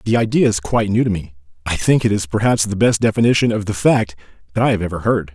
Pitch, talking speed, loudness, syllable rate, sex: 105 Hz, 245 wpm, -17 LUFS, 6.4 syllables/s, male